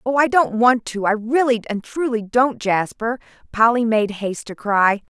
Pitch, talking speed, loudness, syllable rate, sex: 230 Hz, 185 wpm, -19 LUFS, 4.6 syllables/s, female